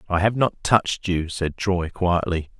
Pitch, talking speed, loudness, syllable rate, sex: 90 Hz, 185 wpm, -22 LUFS, 4.3 syllables/s, male